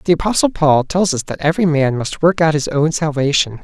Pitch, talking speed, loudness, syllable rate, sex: 155 Hz, 230 wpm, -16 LUFS, 5.6 syllables/s, male